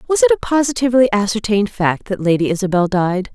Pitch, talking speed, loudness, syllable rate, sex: 220 Hz, 180 wpm, -16 LUFS, 6.5 syllables/s, female